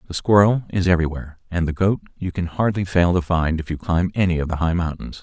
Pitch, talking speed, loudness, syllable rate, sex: 90 Hz, 240 wpm, -20 LUFS, 6.2 syllables/s, male